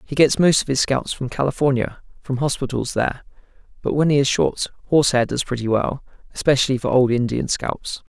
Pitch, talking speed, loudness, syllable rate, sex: 130 Hz, 190 wpm, -20 LUFS, 5.7 syllables/s, male